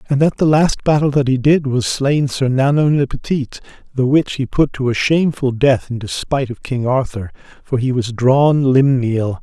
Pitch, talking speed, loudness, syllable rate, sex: 135 Hz, 210 wpm, -16 LUFS, 5.0 syllables/s, male